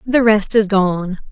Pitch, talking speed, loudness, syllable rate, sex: 205 Hz, 180 wpm, -15 LUFS, 3.6 syllables/s, female